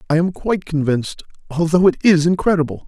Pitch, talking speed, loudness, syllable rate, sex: 165 Hz, 165 wpm, -17 LUFS, 6.3 syllables/s, male